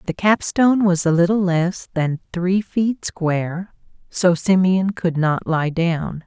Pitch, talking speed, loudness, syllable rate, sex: 180 Hz, 155 wpm, -19 LUFS, 3.8 syllables/s, female